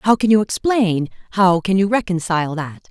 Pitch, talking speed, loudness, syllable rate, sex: 190 Hz, 165 wpm, -18 LUFS, 5.0 syllables/s, female